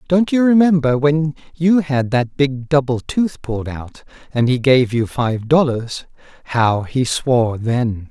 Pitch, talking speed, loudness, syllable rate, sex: 135 Hz, 165 wpm, -17 LUFS, 4.0 syllables/s, male